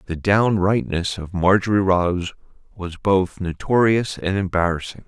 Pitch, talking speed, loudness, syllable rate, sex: 95 Hz, 120 wpm, -20 LUFS, 4.5 syllables/s, male